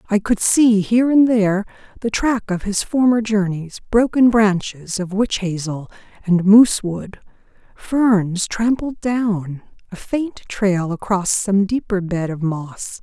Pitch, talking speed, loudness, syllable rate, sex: 205 Hz, 145 wpm, -18 LUFS, 3.8 syllables/s, female